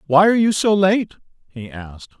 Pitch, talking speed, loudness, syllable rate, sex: 170 Hz, 190 wpm, -16 LUFS, 5.7 syllables/s, male